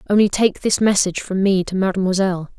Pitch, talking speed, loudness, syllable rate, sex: 190 Hz, 185 wpm, -18 LUFS, 6.4 syllables/s, female